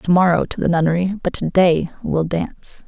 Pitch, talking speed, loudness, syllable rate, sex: 175 Hz, 210 wpm, -18 LUFS, 5.2 syllables/s, female